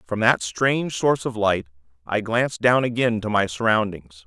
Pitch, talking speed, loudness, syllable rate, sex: 110 Hz, 185 wpm, -21 LUFS, 5.1 syllables/s, male